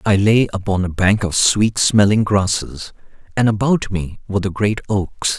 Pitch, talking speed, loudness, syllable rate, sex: 100 Hz, 180 wpm, -17 LUFS, 4.5 syllables/s, male